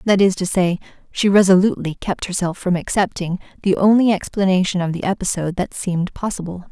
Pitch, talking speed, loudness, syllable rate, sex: 185 Hz, 170 wpm, -18 LUFS, 6.1 syllables/s, female